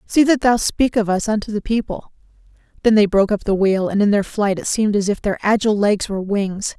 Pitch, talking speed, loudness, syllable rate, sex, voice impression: 210 Hz, 245 wpm, -18 LUFS, 5.9 syllables/s, female, feminine, adult-like, slightly relaxed, slightly bright, soft, slightly raspy, intellectual, calm, friendly, reassuring, kind, modest